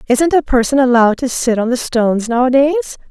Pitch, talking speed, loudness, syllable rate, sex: 245 Hz, 195 wpm, -14 LUFS, 6.1 syllables/s, female